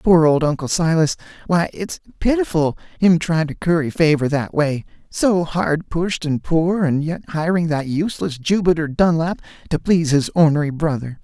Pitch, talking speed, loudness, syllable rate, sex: 160 Hz, 155 wpm, -19 LUFS, 4.8 syllables/s, male